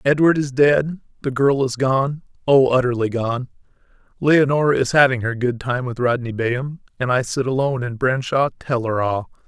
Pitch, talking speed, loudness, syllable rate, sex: 130 Hz, 160 wpm, -19 LUFS, 5.1 syllables/s, male